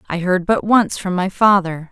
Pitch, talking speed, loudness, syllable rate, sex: 185 Hz, 220 wpm, -16 LUFS, 4.6 syllables/s, female